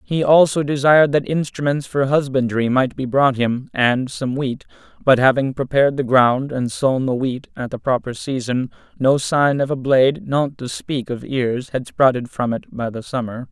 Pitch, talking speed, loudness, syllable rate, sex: 135 Hz, 195 wpm, -18 LUFS, 4.7 syllables/s, male